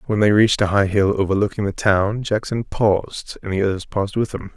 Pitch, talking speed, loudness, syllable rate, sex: 100 Hz, 225 wpm, -19 LUFS, 5.8 syllables/s, male